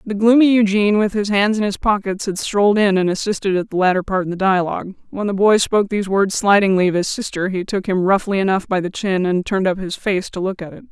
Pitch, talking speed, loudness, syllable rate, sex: 195 Hz, 265 wpm, -17 LUFS, 6.2 syllables/s, female